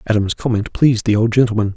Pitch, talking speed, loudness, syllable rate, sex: 110 Hz, 205 wpm, -16 LUFS, 6.8 syllables/s, male